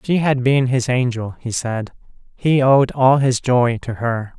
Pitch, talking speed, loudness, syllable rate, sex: 125 Hz, 190 wpm, -17 LUFS, 4.0 syllables/s, male